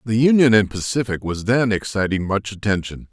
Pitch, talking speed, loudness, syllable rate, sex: 110 Hz, 175 wpm, -19 LUFS, 5.3 syllables/s, male